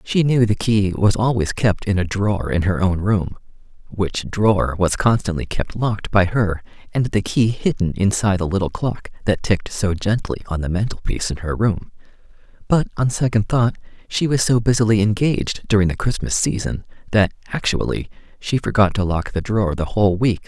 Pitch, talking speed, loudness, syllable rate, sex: 105 Hz, 190 wpm, -20 LUFS, 5.3 syllables/s, male